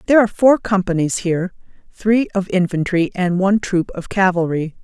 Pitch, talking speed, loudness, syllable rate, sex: 190 Hz, 150 wpm, -17 LUFS, 5.4 syllables/s, female